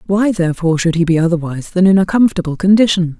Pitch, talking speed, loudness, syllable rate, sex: 180 Hz, 205 wpm, -14 LUFS, 7.3 syllables/s, female